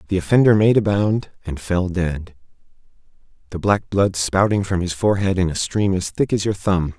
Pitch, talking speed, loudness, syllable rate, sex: 95 Hz, 200 wpm, -19 LUFS, 5.1 syllables/s, male